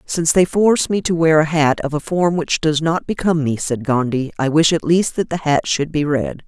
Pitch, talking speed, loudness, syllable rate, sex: 160 Hz, 260 wpm, -17 LUFS, 5.3 syllables/s, female